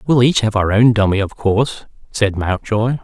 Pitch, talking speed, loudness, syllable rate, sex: 110 Hz, 195 wpm, -16 LUFS, 4.9 syllables/s, male